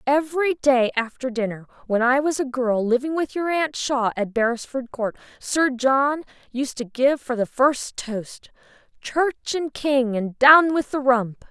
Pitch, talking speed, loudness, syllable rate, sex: 260 Hz, 170 wpm, -21 LUFS, 4.2 syllables/s, female